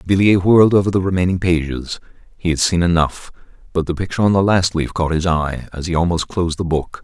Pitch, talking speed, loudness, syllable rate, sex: 90 Hz, 220 wpm, -17 LUFS, 6.1 syllables/s, male